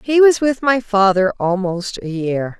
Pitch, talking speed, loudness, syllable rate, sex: 210 Hz, 185 wpm, -16 LUFS, 4.0 syllables/s, female